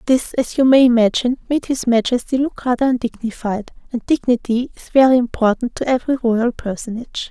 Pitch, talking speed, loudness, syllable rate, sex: 245 Hz, 165 wpm, -17 LUFS, 5.9 syllables/s, female